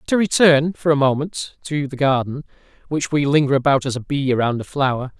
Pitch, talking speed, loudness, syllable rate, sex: 140 Hz, 210 wpm, -19 LUFS, 5.5 syllables/s, male